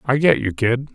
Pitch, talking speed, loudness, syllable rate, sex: 125 Hz, 255 wpm, -18 LUFS, 4.9 syllables/s, male